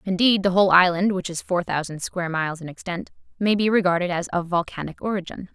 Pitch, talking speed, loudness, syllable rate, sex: 180 Hz, 205 wpm, -22 LUFS, 6.3 syllables/s, female